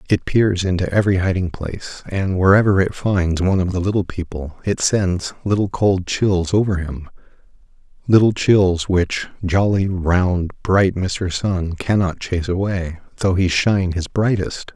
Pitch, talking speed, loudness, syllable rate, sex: 95 Hz, 155 wpm, -18 LUFS, 4.4 syllables/s, male